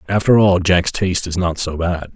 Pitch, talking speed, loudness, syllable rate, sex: 90 Hz, 225 wpm, -16 LUFS, 5.2 syllables/s, male